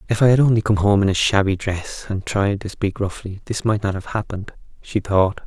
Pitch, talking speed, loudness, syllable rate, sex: 100 Hz, 240 wpm, -20 LUFS, 5.5 syllables/s, male